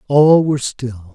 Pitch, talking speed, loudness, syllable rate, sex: 130 Hz, 155 wpm, -14 LUFS, 4.1 syllables/s, male